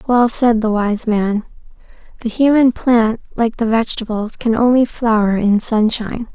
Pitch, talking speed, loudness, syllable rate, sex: 225 Hz, 150 wpm, -16 LUFS, 4.6 syllables/s, female